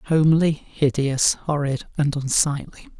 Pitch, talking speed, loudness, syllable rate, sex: 145 Hz, 100 wpm, -21 LUFS, 3.9 syllables/s, male